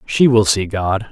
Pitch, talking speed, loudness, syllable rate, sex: 105 Hz, 215 wpm, -15 LUFS, 4.0 syllables/s, male